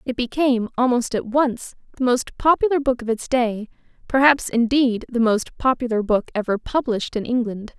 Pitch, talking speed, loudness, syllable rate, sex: 240 Hz, 170 wpm, -20 LUFS, 5.1 syllables/s, female